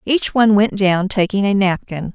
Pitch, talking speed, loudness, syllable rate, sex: 200 Hz, 195 wpm, -16 LUFS, 4.9 syllables/s, female